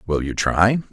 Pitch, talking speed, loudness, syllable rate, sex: 100 Hz, 195 wpm, -19 LUFS, 4.4 syllables/s, male